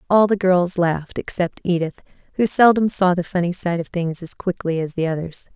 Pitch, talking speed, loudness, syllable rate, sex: 180 Hz, 205 wpm, -20 LUFS, 5.3 syllables/s, female